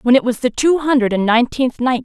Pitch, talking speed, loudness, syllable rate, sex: 250 Hz, 265 wpm, -16 LUFS, 6.2 syllables/s, female